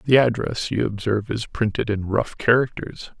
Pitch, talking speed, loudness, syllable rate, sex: 110 Hz, 170 wpm, -22 LUFS, 4.8 syllables/s, male